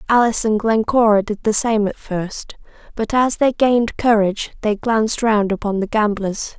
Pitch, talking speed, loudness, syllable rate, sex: 215 Hz, 175 wpm, -18 LUFS, 4.9 syllables/s, female